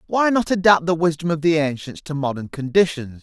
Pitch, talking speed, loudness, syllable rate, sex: 160 Hz, 205 wpm, -19 LUFS, 5.5 syllables/s, male